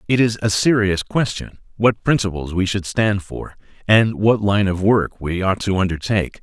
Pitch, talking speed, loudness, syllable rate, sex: 100 Hz, 185 wpm, -18 LUFS, 4.7 syllables/s, male